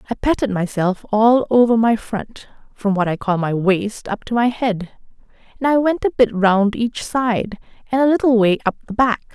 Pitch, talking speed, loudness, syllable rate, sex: 225 Hz, 205 wpm, -18 LUFS, 4.7 syllables/s, female